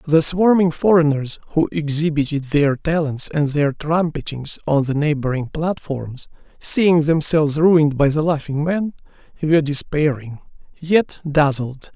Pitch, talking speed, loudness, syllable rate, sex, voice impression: 150 Hz, 125 wpm, -18 LUFS, 4.3 syllables/s, male, masculine, adult-like, slightly soft, slightly refreshing, sincere, friendly